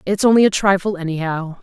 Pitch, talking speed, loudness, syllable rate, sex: 185 Hz, 185 wpm, -17 LUFS, 6.0 syllables/s, female